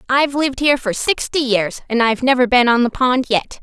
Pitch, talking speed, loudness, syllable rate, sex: 255 Hz, 230 wpm, -16 LUFS, 6.0 syllables/s, female